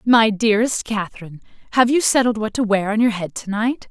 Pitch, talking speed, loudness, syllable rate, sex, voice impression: 220 Hz, 215 wpm, -18 LUFS, 5.8 syllables/s, female, feminine, adult-like, tensed, powerful, clear, slightly fluent, slightly raspy, friendly, elegant, slightly strict, slightly sharp